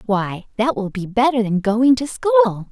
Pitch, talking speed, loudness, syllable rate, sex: 235 Hz, 200 wpm, -18 LUFS, 4.8 syllables/s, female